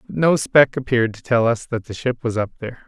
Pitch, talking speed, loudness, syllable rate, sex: 120 Hz, 270 wpm, -19 LUFS, 6.0 syllables/s, male